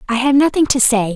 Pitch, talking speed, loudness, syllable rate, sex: 250 Hz, 260 wpm, -14 LUFS, 6.2 syllables/s, female